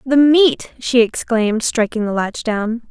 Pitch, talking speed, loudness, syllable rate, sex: 235 Hz, 165 wpm, -16 LUFS, 4.0 syllables/s, female